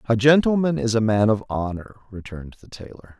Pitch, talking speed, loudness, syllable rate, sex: 115 Hz, 190 wpm, -20 LUFS, 6.0 syllables/s, male